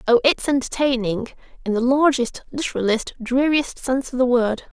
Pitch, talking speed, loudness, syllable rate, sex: 260 Hz, 150 wpm, -20 LUFS, 5.1 syllables/s, female